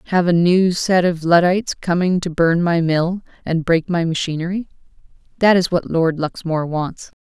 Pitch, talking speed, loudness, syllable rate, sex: 170 Hz, 175 wpm, -18 LUFS, 4.9 syllables/s, female